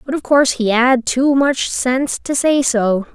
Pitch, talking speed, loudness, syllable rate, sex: 260 Hz, 210 wpm, -15 LUFS, 4.4 syllables/s, female